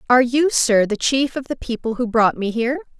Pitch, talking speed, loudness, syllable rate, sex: 245 Hz, 240 wpm, -19 LUFS, 5.7 syllables/s, female